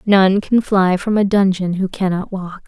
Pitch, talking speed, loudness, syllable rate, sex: 190 Hz, 200 wpm, -16 LUFS, 4.4 syllables/s, female